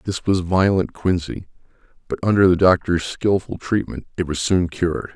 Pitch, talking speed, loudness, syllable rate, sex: 90 Hz, 165 wpm, -20 LUFS, 4.9 syllables/s, male